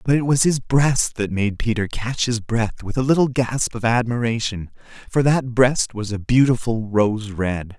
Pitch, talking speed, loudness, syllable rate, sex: 120 Hz, 195 wpm, -20 LUFS, 4.4 syllables/s, male